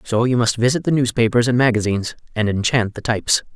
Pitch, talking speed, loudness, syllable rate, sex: 115 Hz, 200 wpm, -18 LUFS, 6.3 syllables/s, male